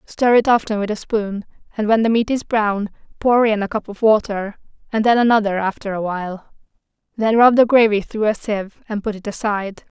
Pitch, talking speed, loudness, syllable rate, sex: 215 Hz, 210 wpm, -18 LUFS, 5.5 syllables/s, female